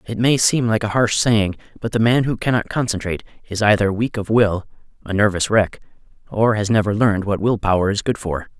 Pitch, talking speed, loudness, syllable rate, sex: 110 Hz, 215 wpm, -19 LUFS, 5.6 syllables/s, male